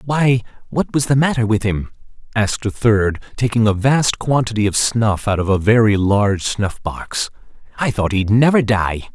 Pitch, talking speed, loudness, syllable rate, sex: 110 Hz, 185 wpm, -17 LUFS, 4.8 syllables/s, male